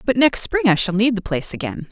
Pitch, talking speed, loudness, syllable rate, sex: 215 Hz, 280 wpm, -19 LUFS, 6.1 syllables/s, female